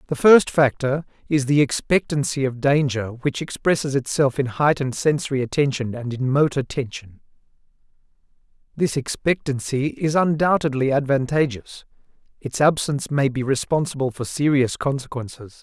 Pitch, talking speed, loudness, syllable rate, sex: 140 Hz, 125 wpm, -21 LUFS, 5.1 syllables/s, male